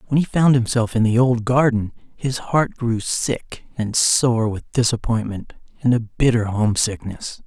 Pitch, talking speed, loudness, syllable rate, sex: 115 Hz, 160 wpm, -19 LUFS, 4.3 syllables/s, male